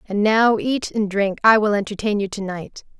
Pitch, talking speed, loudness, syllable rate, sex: 210 Hz, 220 wpm, -19 LUFS, 4.7 syllables/s, female